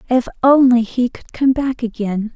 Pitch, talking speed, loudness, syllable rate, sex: 245 Hz, 180 wpm, -16 LUFS, 4.5 syllables/s, female